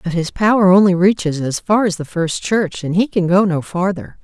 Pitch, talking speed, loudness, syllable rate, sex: 180 Hz, 240 wpm, -16 LUFS, 5.0 syllables/s, female